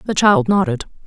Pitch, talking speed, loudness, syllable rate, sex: 190 Hz, 170 wpm, -16 LUFS, 5.6 syllables/s, female